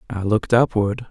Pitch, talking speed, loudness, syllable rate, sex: 105 Hz, 165 wpm, -19 LUFS, 5.5 syllables/s, male